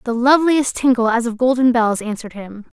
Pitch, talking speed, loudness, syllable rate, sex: 240 Hz, 195 wpm, -16 LUFS, 5.9 syllables/s, female